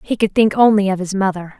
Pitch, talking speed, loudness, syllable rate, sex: 200 Hz, 265 wpm, -16 LUFS, 6.0 syllables/s, female